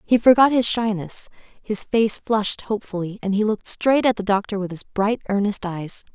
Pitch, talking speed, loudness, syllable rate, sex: 210 Hz, 195 wpm, -21 LUFS, 5.3 syllables/s, female